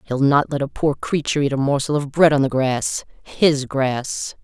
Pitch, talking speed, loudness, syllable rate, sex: 140 Hz, 215 wpm, -19 LUFS, 4.6 syllables/s, female